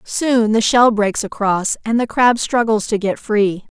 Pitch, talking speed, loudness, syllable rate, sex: 220 Hz, 190 wpm, -16 LUFS, 4.0 syllables/s, female